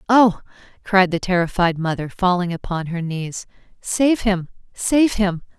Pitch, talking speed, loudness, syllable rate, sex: 190 Hz, 140 wpm, -19 LUFS, 4.2 syllables/s, female